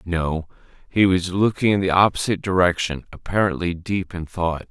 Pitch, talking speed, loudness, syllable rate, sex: 90 Hz, 155 wpm, -21 LUFS, 5.1 syllables/s, male